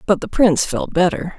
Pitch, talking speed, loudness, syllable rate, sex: 190 Hz, 215 wpm, -17 LUFS, 5.7 syllables/s, female